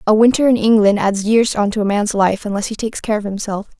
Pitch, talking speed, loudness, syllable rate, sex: 210 Hz, 270 wpm, -16 LUFS, 6.1 syllables/s, female